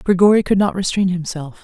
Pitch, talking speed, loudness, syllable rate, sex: 185 Hz, 185 wpm, -17 LUFS, 5.9 syllables/s, female